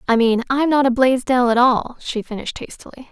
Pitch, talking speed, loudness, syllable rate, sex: 250 Hz, 210 wpm, -18 LUFS, 5.6 syllables/s, female